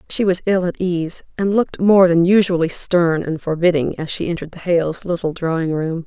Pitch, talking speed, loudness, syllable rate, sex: 175 Hz, 210 wpm, -18 LUFS, 5.3 syllables/s, female